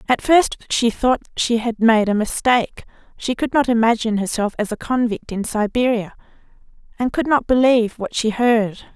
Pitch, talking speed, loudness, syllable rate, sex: 230 Hz, 175 wpm, -18 LUFS, 5.0 syllables/s, female